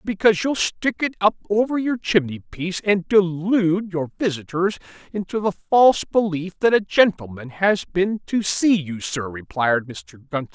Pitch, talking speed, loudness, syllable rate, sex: 180 Hz, 165 wpm, -21 LUFS, 4.6 syllables/s, male